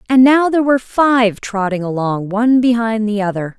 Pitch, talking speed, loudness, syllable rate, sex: 225 Hz, 185 wpm, -15 LUFS, 5.3 syllables/s, female